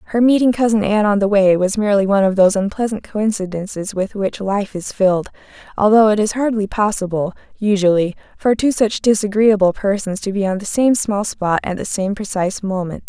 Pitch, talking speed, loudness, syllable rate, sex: 205 Hz, 195 wpm, -17 LUFS, 5.6 syllables/s, female